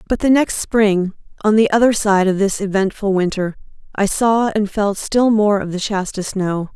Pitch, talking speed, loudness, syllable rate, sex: 205 Hz, 195 wpm, -17 LUFS, 4.6 syllables/s, female